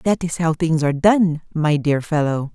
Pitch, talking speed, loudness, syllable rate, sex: 160 Hz, 210 wpm, -19 LUFS, 4.8 syllables/s, female